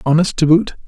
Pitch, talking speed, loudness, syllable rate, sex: 155 Hz, 205 wpm, -14 LUFS, 6.0 syllables/s, male